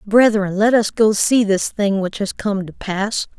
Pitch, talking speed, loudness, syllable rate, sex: 205 Hz, 215 wpm, -17 LUFS, 4.1 syllables/s, female